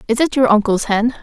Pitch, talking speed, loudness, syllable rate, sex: 235 Hz, 245 wpm, -15 LUFS, 6.0 syllables/s, female